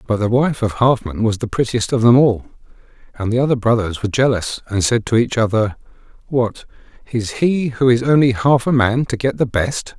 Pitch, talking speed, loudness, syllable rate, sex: 120 Hz, 210 wpm, -17 LUFS, 5.3 syllables/s, male